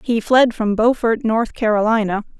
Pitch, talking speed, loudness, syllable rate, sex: 225 Hz, 150 wpm, -17 LUFS, 4.6 syllables/s, female